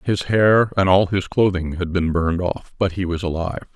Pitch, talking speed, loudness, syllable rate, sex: 90 Hz, 225 wpm, -19 LUFS, 5.3 syllables/s, male